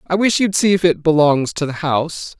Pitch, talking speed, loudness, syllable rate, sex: 160 Hz, 250 wpm, -16 LUFS, 5.3 syllables/s, male